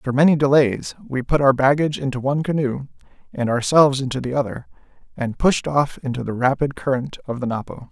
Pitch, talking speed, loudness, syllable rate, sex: 135 Hz, 190 wpm, -20 LUFS, 6.1 syllables/s, male